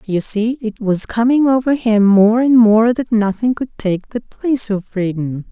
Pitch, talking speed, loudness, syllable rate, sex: 225 Hz, 195 wpm, -15 LUFS, 4.4 syllables/s, female